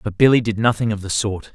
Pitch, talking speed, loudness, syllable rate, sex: 110 Hz, 270 wpm, -18 LUFS, 6.2 syllables/s, male